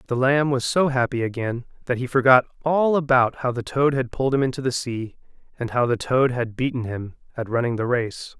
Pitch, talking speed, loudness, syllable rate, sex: 125 Hz, 220 wpm, -22 LUFS, 5.4 syllables/s, male